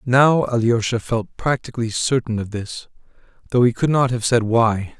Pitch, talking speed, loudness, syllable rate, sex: 115 Hz, 170 wpm, -19 LUFS, 4.7 syllables/s, male